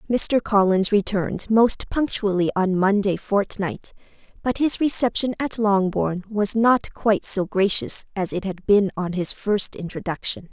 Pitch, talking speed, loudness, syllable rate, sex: 205 Hz, 150 wpm, -21 LUFS, 4.4 syllables/s, female